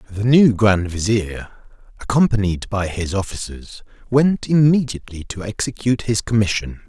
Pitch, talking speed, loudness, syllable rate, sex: 110 Hz, 120 wpm, -18 LUFS, 4.8 syllables/s, male